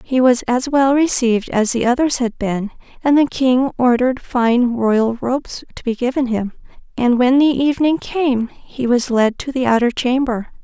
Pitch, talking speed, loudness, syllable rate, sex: 250 Hz, 185 wpm, -17 LUFS, 4.6 syllables/s, female